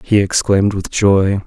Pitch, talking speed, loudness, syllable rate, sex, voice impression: 100 Hz, 165 wpm, -14 LUFS, 4.4 syllables/s, male, very masculine, adult-like, slightly middle-aged, very thick, relaxed, weak, dark, very soft, muffled, fluent, very cool, intellectual, slightly refreshing, very sincere, very calm, very mature, friendly, reassuring, unique, very elegant, slightly wild, very sweet, slightly lively, very kind, very modest